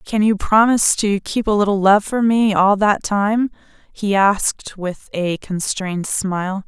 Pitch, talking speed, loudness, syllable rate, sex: 205 Hz, 170 wpm, -17 LUFS, 4.2 syllables/s, female